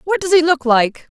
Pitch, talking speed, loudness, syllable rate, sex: 305 Hz, 250 wpm, -15 LUFS, 5.0 syllables/s, female